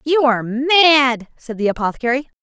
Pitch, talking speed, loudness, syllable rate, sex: 260 Hz, 150 wpm, -15 LUFS, 5.1 syllables/s, female